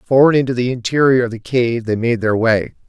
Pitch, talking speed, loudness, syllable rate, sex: 120 Hz, 230 wpm, -16 LUFS, 5.5 syllables/s, male